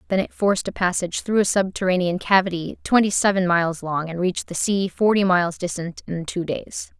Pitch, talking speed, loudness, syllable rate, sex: 185 Hz, 195 wpm, -21 LUFS, 5.8 syllables/s, female